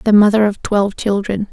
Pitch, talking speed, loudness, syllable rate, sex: 205 Hz, 195 wpm, -15 LUFS, 5.4 syllables/s, female